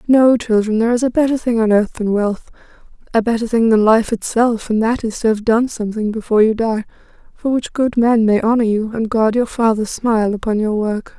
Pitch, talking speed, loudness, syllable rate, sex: 225 Hz, 225 wpm, -16 LUFS, 5.6 syllables/s, female